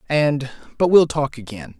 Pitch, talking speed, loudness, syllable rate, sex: 140 Hz, 135 wpm, -18 LUFS, 4.3 syllables/s, male